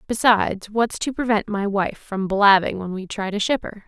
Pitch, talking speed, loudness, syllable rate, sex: 205 Hz, 215 wpm, -21 LUFS, 4.9 syllables/s, female